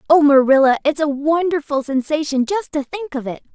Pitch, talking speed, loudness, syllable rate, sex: 295 Hz, 185 wpm, -17 LUFS, 5.4 syllables/s, female